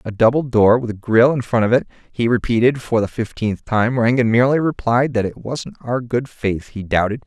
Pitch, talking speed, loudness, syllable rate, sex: 115 Hz, 225 wpm, -18 LUFS, 5.3 syllables/s, male